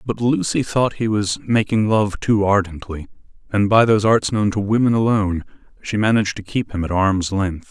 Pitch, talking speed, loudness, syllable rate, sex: 105 Hz, 195 wpm, -18 LUFS, 5.2 syllables/s, male